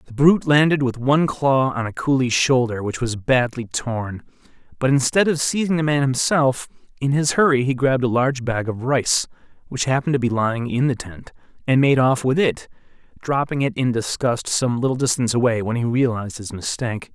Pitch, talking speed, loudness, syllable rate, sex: 130 Hz, 200 wpm, -20 LUFS, 5.6 syllables/s, male